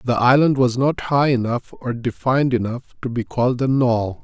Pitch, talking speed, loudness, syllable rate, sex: 125 Hz, 200 wpm, -19 LUFS, 5.3 syllables/s, male